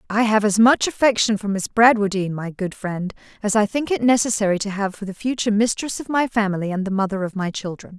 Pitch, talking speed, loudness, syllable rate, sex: 210 Hz, 235 wpm, -20 LUFS, 6.1 syllables/s, female